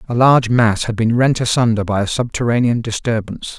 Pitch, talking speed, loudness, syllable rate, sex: 115 Hz, 185 wpm, -16 LUFS, 5.9 syllables/s, male